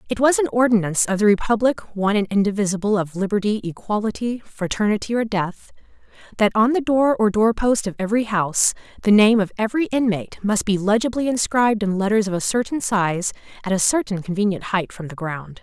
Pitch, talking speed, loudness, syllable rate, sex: 210 Hz, 185 wpm, -20 LUFS, 6.0 syllables/s, female